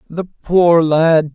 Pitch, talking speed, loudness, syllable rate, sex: 165 Hz, 135 wpm, -13 LUFS, 2.9 syllables/s, male